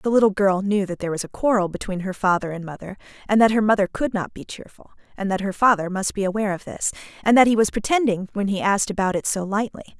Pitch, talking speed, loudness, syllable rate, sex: 200 Hz, 260 wpm, -21 LUFS, 6.6 syllables/s, female